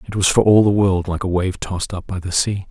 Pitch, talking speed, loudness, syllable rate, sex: 95 Hz, 310 wpm, -18 LUFS, 5.9 syllables/s, male